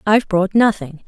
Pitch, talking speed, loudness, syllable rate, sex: 200 Hz, 165 wpm, -16 LUFS, 5.3 syllables/s, female